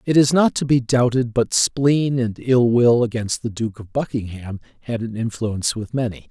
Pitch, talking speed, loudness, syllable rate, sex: 120 Hz, 200 wpm, -19 LUFS, 4.8 syllables/s, male